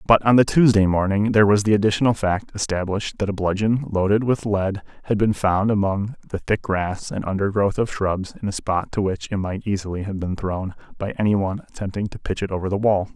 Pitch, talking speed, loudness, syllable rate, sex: 100 Hz, 225 wpm, -21 LUFS, 5.8 syllables/s, male